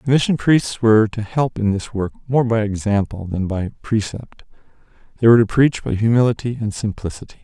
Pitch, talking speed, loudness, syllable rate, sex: 110 Hz, 185 wpm, -18 LUFS, 5.6 syllables/s, male